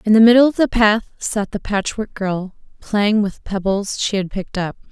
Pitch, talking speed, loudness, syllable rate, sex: 205 Hz, 210 wpm, -18 LUFS, 4.8 syllables/s, female